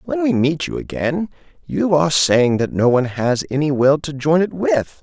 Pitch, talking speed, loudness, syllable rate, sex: 145 Hz, 215 wpm, -17 LUFS, 4.9 syllables/s, male